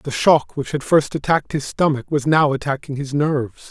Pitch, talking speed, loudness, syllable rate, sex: 140 Hz, 210 wpm, -19 LUFS, 5.4 syllables/s, male